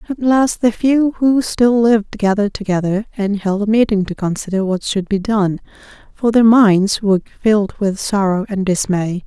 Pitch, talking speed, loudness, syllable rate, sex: 210 Hz, 180 wpm, -16 LUFS, 4.9 syllables/s, female